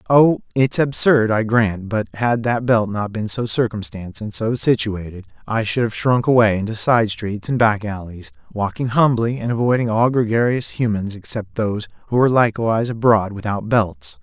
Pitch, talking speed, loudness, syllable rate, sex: 110 Hz, 175 wpm, -19 LUFS, 5.0 syllables/s, male